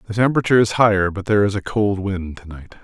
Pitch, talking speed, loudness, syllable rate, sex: 100 Hz, 255 wpm, -18 LUFS, 7.0 syllables/s, male